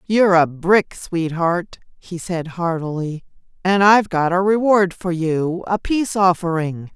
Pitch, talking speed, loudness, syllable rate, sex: 180 Hz, 145 wpm, -18 LUFS, 4.2 syllables/s, female